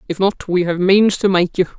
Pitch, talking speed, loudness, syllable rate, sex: 185 Hz, 270 wpm, -16 LUFS, 5.2 syllables/s, female